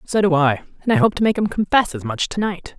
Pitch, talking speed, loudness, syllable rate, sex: 200 Hz, 300 wpm, -19 LUFS, 6.0 syllables/s, female